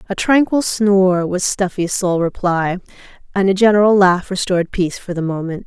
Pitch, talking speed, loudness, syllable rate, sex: 185 Hz, 170 wpm, -16 LUFS, 5.3 syllables/s, female